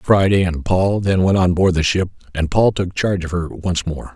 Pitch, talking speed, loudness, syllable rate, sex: 90 Hz, 245 wpm, -18 LUFS, 4.9 syllables/s, male